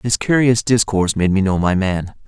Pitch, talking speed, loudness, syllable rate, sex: 105 Hz, 210 wpm, -16 LUFS, 5.1 syllables/s, male